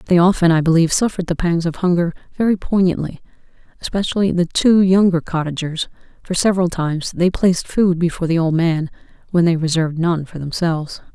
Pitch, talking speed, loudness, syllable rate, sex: 170 Hz, 170 wpm, -17 LUFS, 6.0 syllables/s, female